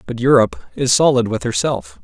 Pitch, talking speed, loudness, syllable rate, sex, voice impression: 130 Hz, 175 wpm, -16 LUFS, 5.5 syllables/s, male, masculine, slightly young, slightly tensed, bright, intellectual, sincere, friendly, slightly lively